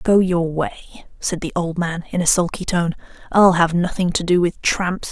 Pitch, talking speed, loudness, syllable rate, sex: 175 Hz, 210 wpm, -19 LUFS, 4.8 syllables/s, female